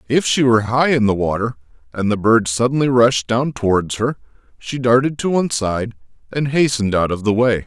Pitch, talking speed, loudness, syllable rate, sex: 115 Hz, 205 wpm, -17 LUFS, 5.5 syllables/s, male